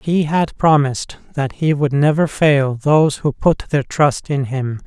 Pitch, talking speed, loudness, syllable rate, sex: 145 Hz, 185 wpm, -16 LUFS, 4.2 syllables/s, male